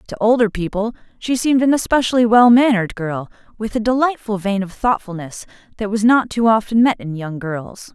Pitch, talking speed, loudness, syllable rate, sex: 215 Hz, 190 wpm, -17 LUFS, 5.5 syllables/s, female